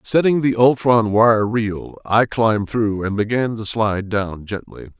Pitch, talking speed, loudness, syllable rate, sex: 110 Hz, 170 wpm, -18 LUFS, 4.2 syllables/s, male